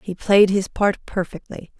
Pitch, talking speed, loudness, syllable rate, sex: 190 Hz, 170 wpm, -19 LUFS, 4.2 syllables/s, female